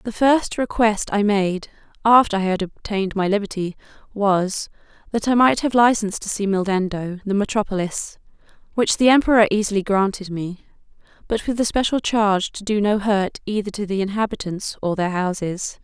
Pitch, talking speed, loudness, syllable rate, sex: 205 Hz, 165 wpm, -20 LUFS, 5.2 syllables/s, female